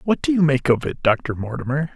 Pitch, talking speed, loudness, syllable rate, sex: 145 Hz, 245 wpm, -20 LUFS, 5.5 syllables/s, male